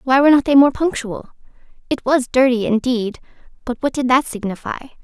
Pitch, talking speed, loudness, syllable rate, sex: 255 Hz, 180 wpm, -17 LUFS, 5.5 syllables/s, female